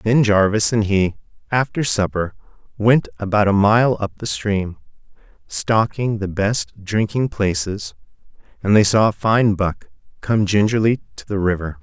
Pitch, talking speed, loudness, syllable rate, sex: 105 Hz, 145 wpm, -18 LUFS, 4.2 syllables/s, male